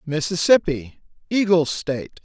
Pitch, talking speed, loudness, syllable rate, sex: 165 Hz, 80 wpm, -20 LUFS, 4.7 syllables/s, male